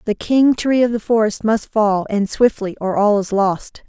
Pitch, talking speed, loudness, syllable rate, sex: 215 Hz, 215 wpm, -17 LUFS, 4.4 syllables/s, female